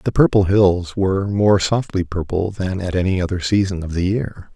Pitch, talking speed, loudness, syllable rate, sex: 95 Hz, 200 wpm, -18 LUFS, 4.9 syllables/s, male